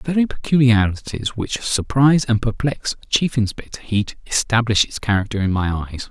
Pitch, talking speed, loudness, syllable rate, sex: 115 Hz, 155 wpm, -19 LUFS, 5.1 syllables/s, male